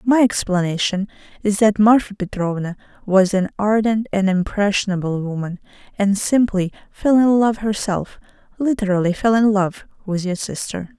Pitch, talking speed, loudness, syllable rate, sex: 200 Hz, 125 wpm, -19 LUFS, 4.8 syllables/s, female